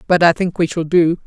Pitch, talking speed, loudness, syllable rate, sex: 170 Hz, 285 wpm, -15 LUFS, 5.6 syllables/s, female